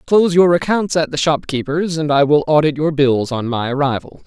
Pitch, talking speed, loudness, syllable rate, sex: 150 Hz, 210 wpm, -16 LUFS, 5.3 syllables/s, male